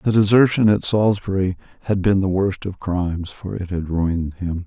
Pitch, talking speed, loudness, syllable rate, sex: 95 Hz, 195 wpm, -20 LUFS, 5.2 syllables/s, male